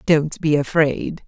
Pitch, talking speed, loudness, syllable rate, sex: 150 Hz, 140 wpm, -19 LUFS, 3.5 syllables/s, female